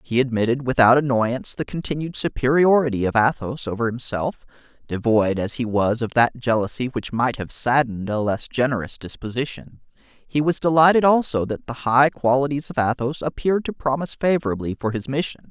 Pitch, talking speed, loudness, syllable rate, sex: 130 Hz, 165 wpm, -21 LUFS, 5.5 syllables/s, male